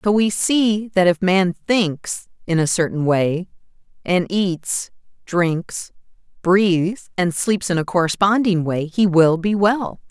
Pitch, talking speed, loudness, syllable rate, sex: 185 Hz, 150 wpm, -19 LUFS, 3.6 syllables/s, female